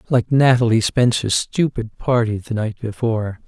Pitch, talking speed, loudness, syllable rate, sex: 115 Hz, 140 wpm, -18 LUFS, 4.7 syllables/s, male